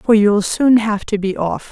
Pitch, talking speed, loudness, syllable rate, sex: 210 Hz, 245 wpm, -15 LUFS, 4.2 syllables/s, female